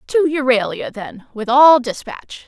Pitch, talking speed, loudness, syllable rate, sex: 260 Hz, 145 wpm, -15 LUFS, 4.0 syllables/s, female